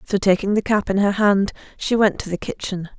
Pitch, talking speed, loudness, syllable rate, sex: 200 Hz, 240 wpm, -20 LUFS, 5.5 syllables/s, female